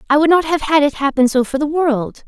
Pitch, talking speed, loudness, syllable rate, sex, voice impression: 285 Hz, 290 wpm, -15 LUFS, 5.8 syllables/s, female, very feminine, very young, very thin, tensed, slightly powerful, very bright, hard, very clear, halting, very cute, intellectual, refreshing, very sincere, slightly calm, very friendly, reassuring, very unique, slightly elegant, wild, slightly sweet, lively, slightly strict, intense, slightly sharp